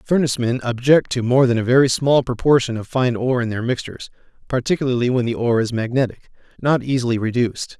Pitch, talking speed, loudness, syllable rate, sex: 125 Hz, 185 wpm, -19 LUFS, 6.5 syllables/s, male